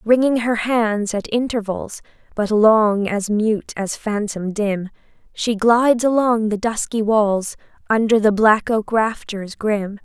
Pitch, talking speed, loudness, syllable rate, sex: 215 Hz, 145 wpm, -18 LUFS, 3.8 syllables/s, female